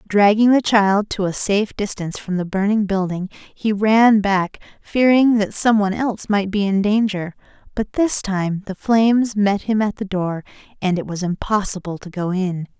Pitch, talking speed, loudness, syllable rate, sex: 200 Hz, 190 wpm, -19 LUFS, 4.7 syllables/s, female